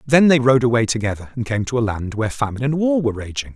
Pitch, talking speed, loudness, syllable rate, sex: 120 Hz, 270 wpm, -19 LUFS, 7.0 syllables/s, male